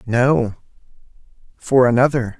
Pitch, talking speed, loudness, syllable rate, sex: 125 Hz, 75 wpm, -17 LUFS, 3.7 syllables/s, male